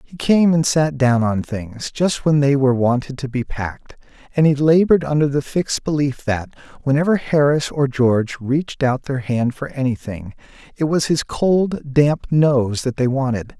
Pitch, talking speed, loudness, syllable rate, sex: 135 Hz, 185 wpm, -18 LUFS, 4.7 syllables/s, male